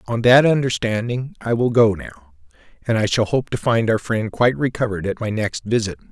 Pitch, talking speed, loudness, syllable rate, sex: 115 Hz, 205 wpm, -19 LUFS, 5.5 syllables/s, male